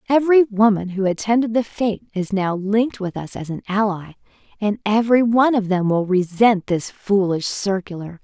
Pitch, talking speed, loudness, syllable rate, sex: 205 Hz, 175 wpm, -19 LUFS, 5.3 syllables/s, female